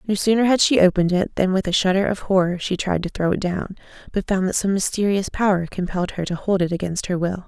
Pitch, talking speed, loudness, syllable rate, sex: 190 Hz, 255 wpm, -20 LUFS, 6.3 syllables/s, female